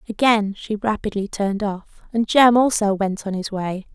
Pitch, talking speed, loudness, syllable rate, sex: 210 Hz, 185 wpm, -20 LUFS, 4.7 syllables/s, female